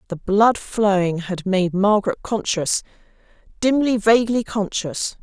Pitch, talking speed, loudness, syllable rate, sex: 205 Hz, 105 wpm, -20 LUFS, 4.3 syllables/s, female